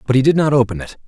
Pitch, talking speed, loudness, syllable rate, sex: 130 Hz, 335 wpm, -15 LUFS, 8.0 syllables/s, male